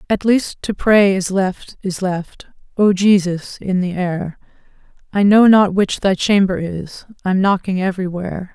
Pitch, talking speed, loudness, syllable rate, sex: 190 Hz, 170 wpm, -16 LUFS, 4.4 syllables/s, female